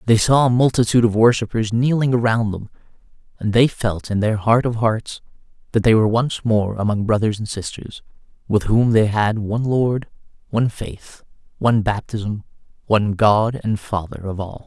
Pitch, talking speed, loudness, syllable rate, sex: 110 Hz, 170 wpm, -19 LUFS, 5.1 syllables/s, male